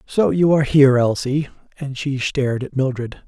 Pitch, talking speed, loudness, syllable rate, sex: 135 Hz, 185 wpm, -18 LUFS, 5.5 syllables/s, male